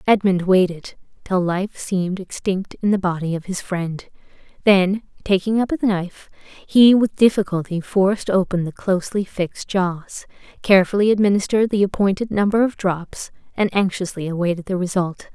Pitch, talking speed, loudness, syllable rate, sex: 190 Hz, 150 wpm, -19 LUFS, 5.1 syllables/s, female